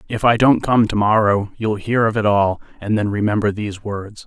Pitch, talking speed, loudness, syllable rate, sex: 105 Hz, 225 wpm, -18 LUFS, 5.2 syllables/s, male